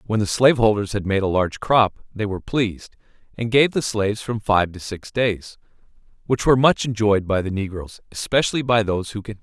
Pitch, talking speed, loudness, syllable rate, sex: 105 Hz, 210 wpm, -20 LUFS, 6.0 syllables/s, male